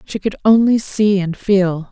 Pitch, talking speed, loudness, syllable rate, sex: 200 Hz, 190 wpm, -15 LUFS, 4.1 syllables/s, female